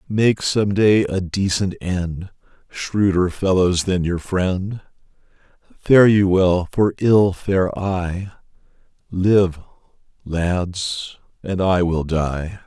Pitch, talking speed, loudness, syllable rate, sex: 95 Hz, 115 wpm, -19 LUFS, 2.9 syllables/s, male